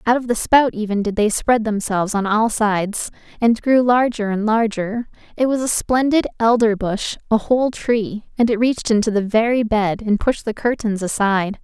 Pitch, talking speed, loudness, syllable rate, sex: 220 Hz, 190 wpm, -18 LUFS, 5.0 syllables/s, female